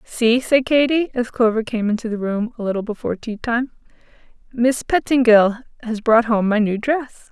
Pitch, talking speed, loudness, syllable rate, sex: 235 Hz, 180 wpm, -19 LUFS, 4.9 syllables/s, female